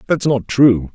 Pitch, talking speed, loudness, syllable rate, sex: 120 Hz, 190 wpm, -15 LUFS, 4.0 syllables/s, male